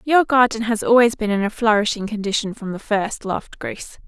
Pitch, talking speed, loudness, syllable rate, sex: 220 Hz, 205 wpm, -19 LUFS, 5.6 syllables/s, female